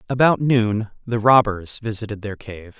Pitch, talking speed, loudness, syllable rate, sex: 110 Hz, 150 wpm, -19 LUFS, 4.5 syllables/s, male